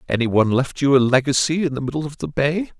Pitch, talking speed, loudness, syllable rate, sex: 140 Hz, 255 wpm, -19 LUFS, 6.6 syllables/s, male